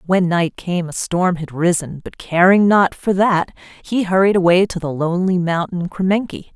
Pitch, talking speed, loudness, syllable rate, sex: 180 Hz, 185 wpm, -17 LUFS, 4.8 syllables/s, female